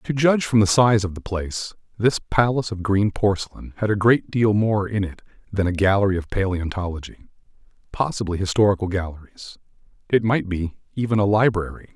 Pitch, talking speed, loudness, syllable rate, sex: 100 Hz, 170 wpm, -21 LUFS, 5.7 syllables/s, male